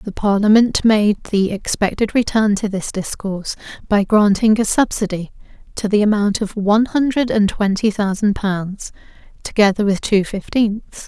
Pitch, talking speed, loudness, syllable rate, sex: 205 Hz, 145 wpm, -17 LUFS, 4.7 syllables/s, female